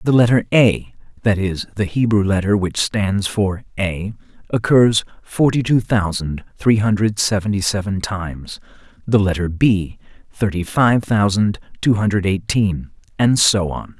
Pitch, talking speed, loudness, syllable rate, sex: 100 Hz, 135 wpm, -18 LUFS, 4.3 syllables/s, male